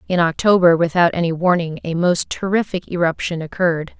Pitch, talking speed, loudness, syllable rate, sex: 170 Hz, 150 wpm, -18 LUFS, 5.5 syllables/s, female